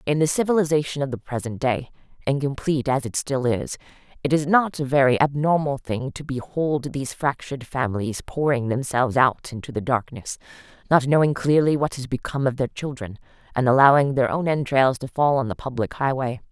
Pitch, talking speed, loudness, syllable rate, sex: 135 Hz, 180 wpm, -22 LUFS, 5.6 syllables/s, female